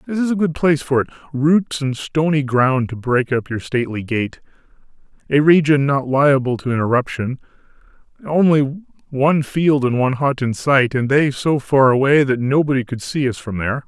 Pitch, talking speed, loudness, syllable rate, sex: 140 Hz, 185 wpm, -17 LUFS, 5.3 syllables/s, male